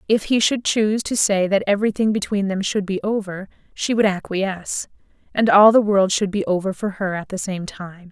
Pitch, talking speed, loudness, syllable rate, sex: 200 Hz, 205 wpm, -19 LUFS, 5.3 syllables/s, female